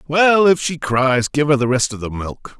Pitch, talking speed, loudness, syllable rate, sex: 140 Hz, 255 wpm, -16 LUFS, 4.6 syllables/s, male